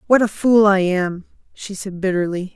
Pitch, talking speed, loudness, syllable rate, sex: 195 Hz, 190 wpm, -18 LUFS, 4.7 syllables/s, female